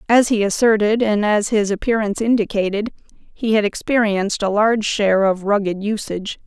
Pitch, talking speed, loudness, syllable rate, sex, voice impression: 210 Hz, 160 wpm, -18 LUFS, 5.5 syllables/s, female, very feminine, slightly young, slightly adult-like, very thin, tensed, slightly powerful, slightly bright, hard, clear, fluent, slightly raspy, cool, intellectual, very refreshing, sincere, very calm, friendly, slightly reassuring, slightly unique, slightly elegant, wild, slightly lively, strict, sharp, slightly modest